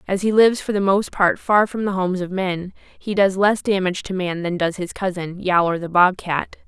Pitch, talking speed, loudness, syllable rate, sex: 190 Hz, 245 wpm, -20 LUFS, 5.2 syllables/s, female